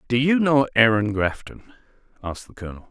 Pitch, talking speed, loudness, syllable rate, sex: 120 Hz, 165 wpm, -19 LUFS, 6.3 syllables/s, male